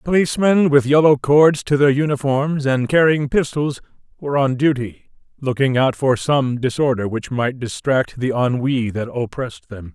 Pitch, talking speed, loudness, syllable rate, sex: 135 Hz, 155 wpm, -18 LUFS, 4.7 syllables/s, male